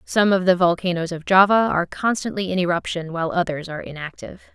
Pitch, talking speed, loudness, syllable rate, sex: 180 Hz, 185 wpm, -20 LUFS, 6.3 syllables/s, female